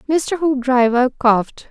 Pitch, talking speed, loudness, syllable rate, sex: 265 Hz, 105 wpm, -16 LUFS, 4.2 syllables/s, female